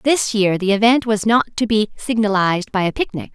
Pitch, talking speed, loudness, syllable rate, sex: 215 Hz, 215 wpm, -17 LUFS, 5.3 syllables/s, female